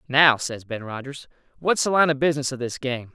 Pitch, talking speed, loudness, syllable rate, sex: 135 Hz, 230 wpm, -22 LUFS, 5.7 syllables/s, male